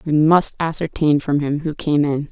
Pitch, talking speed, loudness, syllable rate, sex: 150 Hz, 205 wpm, -18 LUFS, 4.6 syllables/s, female